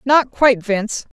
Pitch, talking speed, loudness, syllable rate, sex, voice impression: 240 Hz, 150 wpm, -17 LUFS, 5.0 syllables/s, female, feminine, very adult-like, slightly powerful, slightly cool, intellectual, slightly strict, slightly sharp